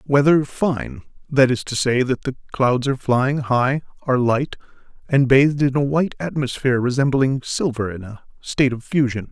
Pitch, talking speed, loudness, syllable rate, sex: 130 Hz, 175 wpm, -19 LUFS, 5.1 syllables/s, male